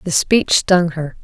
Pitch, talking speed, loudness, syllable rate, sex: 175 Hz, 195 wpm, -15 LUFS, 3.7 syllables/s, female